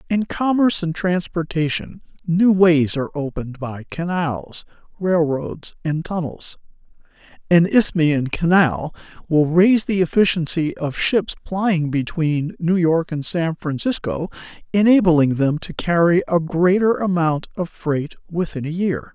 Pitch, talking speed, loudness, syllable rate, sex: 170 Hz, 130 wpm, -19 LUFS, 4.2 syllables/s, male